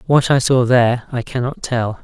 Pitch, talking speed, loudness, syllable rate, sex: 125 Hz, 205 wpm, -16 LUFS, 5.0 syllables/s, male